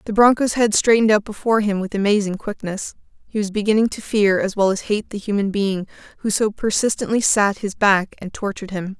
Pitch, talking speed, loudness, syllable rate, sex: 205 Hz, 205 wpm, -19 LUFS, 5.8 syllables/s, female